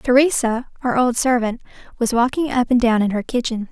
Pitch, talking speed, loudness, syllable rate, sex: 240 Hz, 195 wpm, -19 LUFS, 5.4 syllables/s, female